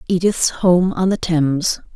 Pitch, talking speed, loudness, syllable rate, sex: 175 Hz, 155 wpm, -17 LUFS, 4.2 syllables/s, female